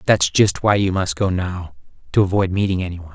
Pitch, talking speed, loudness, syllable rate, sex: 95 Hz, 230 wpm, -19 LUFS, 6.1 syllables/s, male